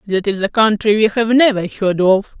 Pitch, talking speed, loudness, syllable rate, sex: 210 Hz, 225 wpm, -14 LUFS, 5.0 syllables/s, female